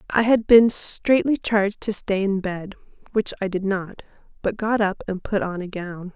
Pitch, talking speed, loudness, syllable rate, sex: 200 Hz, 205 wpm, -22 LUFS, 4.6 syllables/s, female